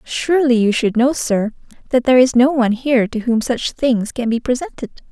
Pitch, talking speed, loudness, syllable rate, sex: 245 Hz, 210 wpm, -16 LUFS, 5.6 syllables/s, female